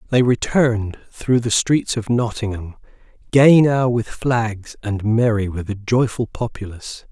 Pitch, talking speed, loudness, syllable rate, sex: 115 Hz, 145 wpm, -18 LUFS, 4.3 syllables/s, male